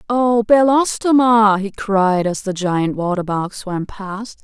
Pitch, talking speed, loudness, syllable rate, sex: 210 Hz, 150 wpm, -16 LUFS, 3.6 syllables/s, female